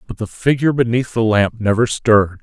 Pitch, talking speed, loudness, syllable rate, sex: 115 Hz, 200 wpm, -16 LUFS, 5.8 syllables/s, male